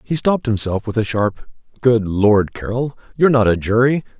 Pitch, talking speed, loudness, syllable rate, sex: 115 Hz, 185 wpm, -17 LUFS, 5.2 syllables/s, male